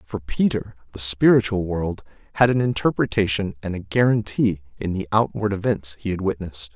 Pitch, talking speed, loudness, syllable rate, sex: 100 Hz, 160 wpm, -22 LUFS, 5.4 syllables/s, male